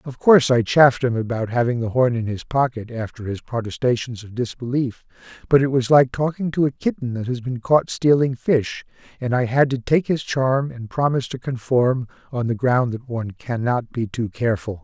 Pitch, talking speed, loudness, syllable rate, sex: 125 Hz, 205 wpm, -21 LUFS, 5.3 syllables/s, male